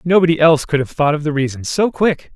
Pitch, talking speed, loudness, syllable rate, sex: 155 Hz, 255 wpm, -16 LUFS, 6.2 syllables/s, male